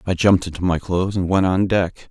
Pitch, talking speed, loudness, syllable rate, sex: 90 Hz, 255 wpm, -19 LUFS, 6.1 syllables/s, male